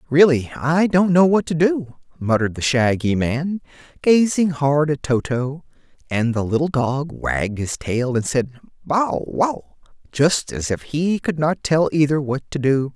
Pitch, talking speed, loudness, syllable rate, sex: 145 Hz, 170 wpm, -19 LUFS, 4.3 syllables/s, male